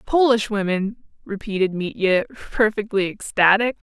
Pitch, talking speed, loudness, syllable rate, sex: 205 Hz, 90 wpm, -20 LUFS, 4.8 syllables/s, female